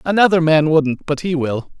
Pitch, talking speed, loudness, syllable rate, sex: 160 Hz, 200 wpm, -16 LUFS, 4.9 syllables/s, male